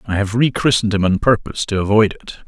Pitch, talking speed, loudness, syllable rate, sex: 105 Hz, 240 wpm, -16 LUFS, 6.7 syllables/s, male